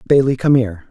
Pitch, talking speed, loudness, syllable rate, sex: 120 Hz, 200 wpm, -15 LUFS, 6.4 syllables/s, male